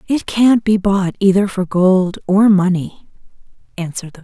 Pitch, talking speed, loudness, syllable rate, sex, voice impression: 190 Hz, 170 wpm, -15 LUFS, 4.8 syllables/s, female, feminine, adult-like, soft, muffled, halting, calm, slightly friendly, reassuring, slightly elegant, kind, modest